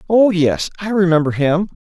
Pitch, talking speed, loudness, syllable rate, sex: 180 Hz, 165 wpm, -16 LUFS, 5.0 syllables/s, male